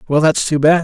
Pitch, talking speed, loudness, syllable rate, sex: 155 Hz, 290 wpm, -14 LUFS, 5.6 syllables/s, male